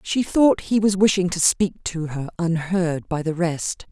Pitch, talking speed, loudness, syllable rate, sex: 175 Hz, 200 wpm, -21 LUFS, 4.1 syllables/s, female